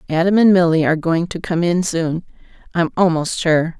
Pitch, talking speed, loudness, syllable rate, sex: 170 Hz, 190 wpm, -17 LUFS, 5.3 syllables/s, female